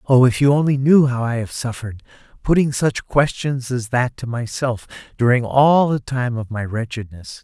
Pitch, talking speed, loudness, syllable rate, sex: 125 Hz, 185 wpm, -18 LUFS, 4.8 syllables/s, male